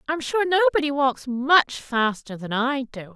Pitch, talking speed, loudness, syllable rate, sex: 275 Hz, 170 wpm, -22 LUFS, 4.7 syllables/s, female